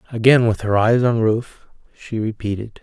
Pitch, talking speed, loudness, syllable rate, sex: 115 Hz, 170 wpm, -18 LUFS, 5.2 syllables/s, male